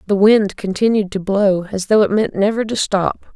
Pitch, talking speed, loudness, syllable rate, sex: 200 Hz, 215 wpm, -16 LUFS, 4.9 syllables/s, female